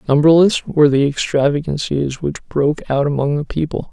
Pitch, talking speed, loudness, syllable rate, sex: 145 Hz, 155 wpm, -16 LUFS, 5.3 syllables/s, male